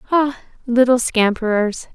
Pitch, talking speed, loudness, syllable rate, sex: 240 Hz, 95 wpm, -17 LUFS, 4.3 syllables/s, female